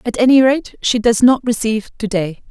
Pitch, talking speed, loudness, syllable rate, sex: 230 Hz, 215 wpm, -15 LUFS, 5.2 syllables/s, female